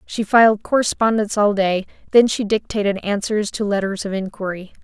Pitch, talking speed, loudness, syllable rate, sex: 205 Hz, 160 wpm, -19 LUFS, 5.5 syllables/s, female